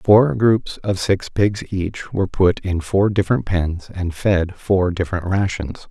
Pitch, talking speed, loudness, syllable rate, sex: 95 Hz, 175 wpm, -19 LUFS, 4.1 syllables/s, male